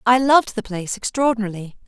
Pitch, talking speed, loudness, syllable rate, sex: 225 Hz, 160 wpm, -19 LUFS, 7.1 syllables/s, female